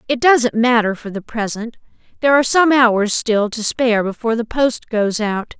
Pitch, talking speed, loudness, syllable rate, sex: 230 Hz, 195 wpm, -16 LUFS, 5.0 syllables/s, female